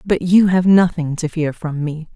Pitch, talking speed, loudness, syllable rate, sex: 165 Hz, 225 wpm, -16 LUFS, 4.5 syllables/s, female